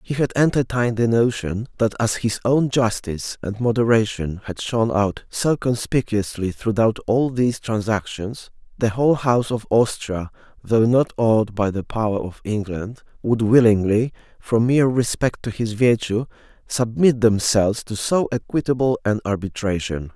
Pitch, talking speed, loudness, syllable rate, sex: 115 Hz, 145 wpm, -20 LUFS, 4.8 syllables/s, male